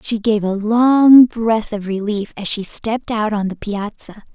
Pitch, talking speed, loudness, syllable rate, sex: 215 Hz, 195 wpm, -16 LUFS, 4.5 syllables/s, female